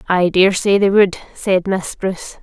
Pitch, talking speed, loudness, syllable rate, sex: 190 Hz, 200 wpm, -16 LUFS, 4.4 syllables/s, female